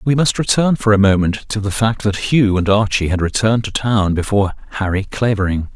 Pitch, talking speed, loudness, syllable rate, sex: 105 Hz, 210 wpm, -16 LUFS, 5.6 syllables/s, male